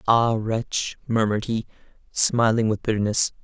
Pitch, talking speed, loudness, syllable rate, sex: 110 Hz, 120 wpm, -23 LUFS, 4.5 syllables/s, male